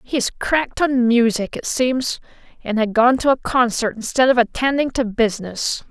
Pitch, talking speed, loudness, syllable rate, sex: 240 Hz, 175 wpm, -18 LUFS, 4.7 syllables/s, female